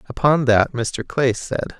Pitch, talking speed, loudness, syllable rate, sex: 125 Hz, 165 wpm, -19 LUFS, 4.1 syllables/s, male